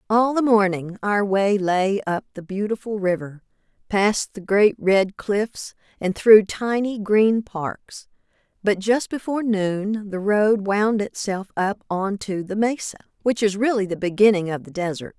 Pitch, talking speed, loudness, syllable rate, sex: 205 Hz, 160 wpm, -21 LUFS, 4.1 syllables/s, female